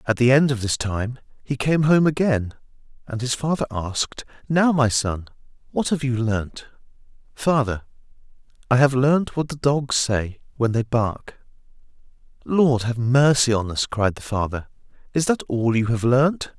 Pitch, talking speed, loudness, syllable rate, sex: 125 Hz, 165 wpm, -21 LUFS, 4.4 syllables/s, male